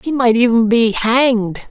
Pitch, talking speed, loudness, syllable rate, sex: 235 Hz, 175 wpm, -14 LUFS, 4.2 syllables/s, male